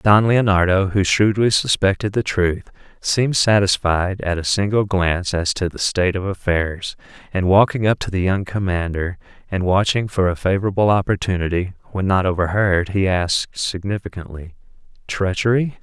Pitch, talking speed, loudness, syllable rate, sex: 95 Hz, 150 wpm, -19 LUFS, 5.0 syllables/s, male